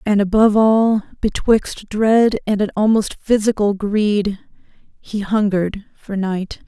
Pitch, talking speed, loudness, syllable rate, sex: 210 Hz, 125 wpm, -17 LUFS, 4.2 syllables/s, female